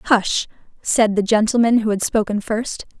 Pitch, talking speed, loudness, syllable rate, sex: 220 Hz, 160 wpm, -18 LUFS, 4.4 syllables/s, female